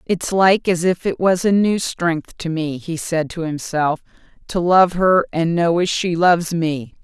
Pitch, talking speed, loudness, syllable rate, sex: 170 Hz, 205 wpm, -18 LUFS, 4.1 syllables/s, female